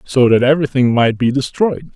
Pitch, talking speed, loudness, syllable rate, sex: 135 Hz, 185 wpm, -14 LUFS, 5.5 syllables/s, male